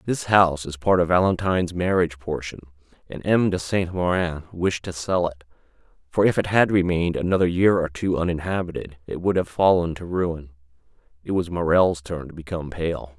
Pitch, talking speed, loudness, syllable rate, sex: 85 Hz, 180 wpm, -22 LUFS, 5.5 syllables/s, male